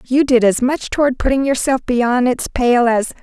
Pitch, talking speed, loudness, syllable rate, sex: 250 Hz, 205 wpm, -15 LUFS, 4.7 syllables/s, female